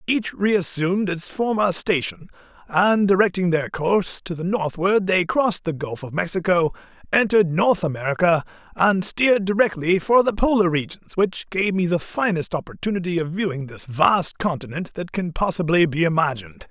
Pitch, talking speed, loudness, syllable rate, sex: 180 Hz, 160 wpm, -21 LUFS, 5.1 syllables/s, male